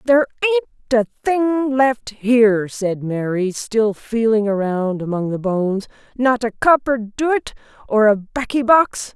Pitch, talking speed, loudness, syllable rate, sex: 225 Hz, 145 wpm, -18 LUFS, 4.0 syllables/s, female